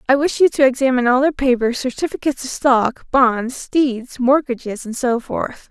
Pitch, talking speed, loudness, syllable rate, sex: 255 Hz, 180 wpm, -18 LUFS, 5.1 syllables/s, female